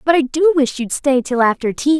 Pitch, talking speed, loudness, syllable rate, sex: 275 Hz, 270 wpm, -16 LUFS, 5.2 syllables/s, female